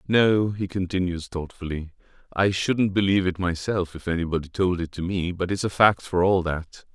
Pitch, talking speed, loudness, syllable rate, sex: 90 Hz, 190 wpm, -24 LUFS, 5.1 syllables/s, male